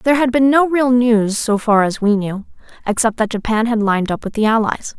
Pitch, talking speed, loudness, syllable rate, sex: 225 Hz, 240 wpm, -16 LUFS, 5.5 syllables/s, female